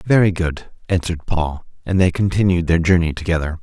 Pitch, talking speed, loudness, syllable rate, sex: 85 Hz, 165 wpm, -18 LUFS, 5.7 syllables/s, male